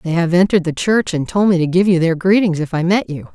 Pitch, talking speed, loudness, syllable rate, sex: 175 Hz, 305 wpm, -15 LUFS, 6.2 syllables/s, female